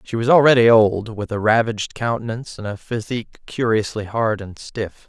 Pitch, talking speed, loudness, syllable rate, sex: 110 Hz, 175 wpm, -19 LUFS, 5.3 syllables/s, male